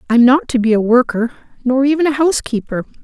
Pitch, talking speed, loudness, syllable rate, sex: 255 Hz, 200 wpm, -15 LUFS, 6.3 syllables/s, female